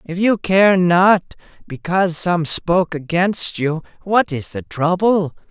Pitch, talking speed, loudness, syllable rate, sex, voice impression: 175 Hz, 140 wpm, -17 LUFS, 3.8 syllables/s, male, masculine, very adult-like, slightly calm, slightly unique, slightly kind